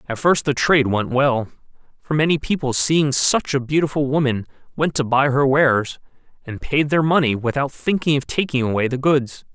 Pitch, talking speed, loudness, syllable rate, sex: 140 Hz, 190 wpm, -19 LUFS, 5.2 syllables/s, male